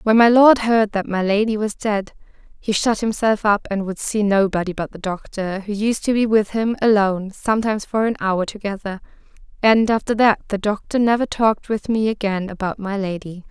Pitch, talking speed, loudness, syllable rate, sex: 210 Hz, 200 wpm, -19 LUFS, 5.2 syllables/s, female